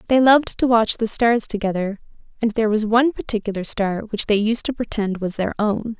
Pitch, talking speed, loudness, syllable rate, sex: 220 Hz, 210 wpm, -20 LUFS, 5.7 syllables/s, female